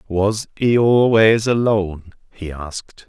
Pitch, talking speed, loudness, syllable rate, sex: 105 Hz, 115 wpm, -16 LUFS, 3.8 syllables/s, male